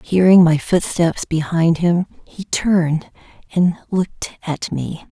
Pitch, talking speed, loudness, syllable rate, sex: 170 Hz, 130 wpm, -17 LUFS, 3.9 syllables/s, female